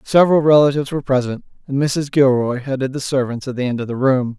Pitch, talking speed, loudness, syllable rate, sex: 135 Hz, 220 wpm, -17 LUFS, 6.4 syllables/s, male